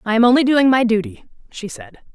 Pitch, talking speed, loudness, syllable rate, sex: 245 Hz, 225 wpm, -15 LUFS, 5.8 syllables/s, female